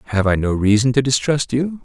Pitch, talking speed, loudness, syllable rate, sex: 125 Hz, 230 wpm, -17 LUFS, 5.0 syllables/s, male